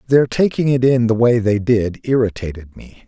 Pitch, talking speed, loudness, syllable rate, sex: 115 Hz, 195 wpm, -16 LUFS, 5.0 syllables/s, male